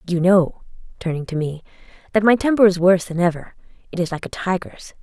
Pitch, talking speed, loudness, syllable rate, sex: 180 Hz, 205 wpm, -19 LUFS, 6.1 syllables/s, female